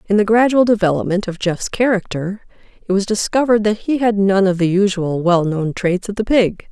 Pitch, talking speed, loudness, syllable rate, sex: 200 Hz, 195 wpm, -16 LUFS, 5.3 syllables/s, female